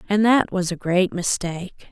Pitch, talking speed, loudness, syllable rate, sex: 190 Hz, 190 wpm, -21 LUFS, 4.7 syllables/s, female